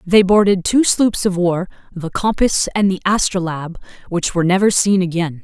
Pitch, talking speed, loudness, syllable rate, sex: 185 Hz, 175 wpm, -16 LUFS, 5.1 syllables/s, female